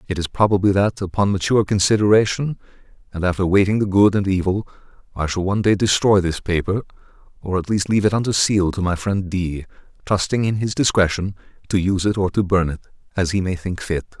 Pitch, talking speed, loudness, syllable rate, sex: 95 Hz, 205 wpm, -19 LUFS, 6.2 syllables/s, male